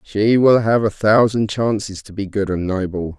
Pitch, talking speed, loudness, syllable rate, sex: 105 Hz, 205 wpm, -17 LUFS, 4.5 syllables/s, male